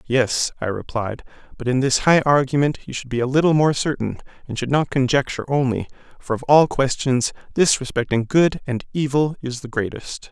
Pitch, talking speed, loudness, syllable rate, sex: 135 Hz, 185 wpm, -20 LUFS, 5.3 syllables/s, male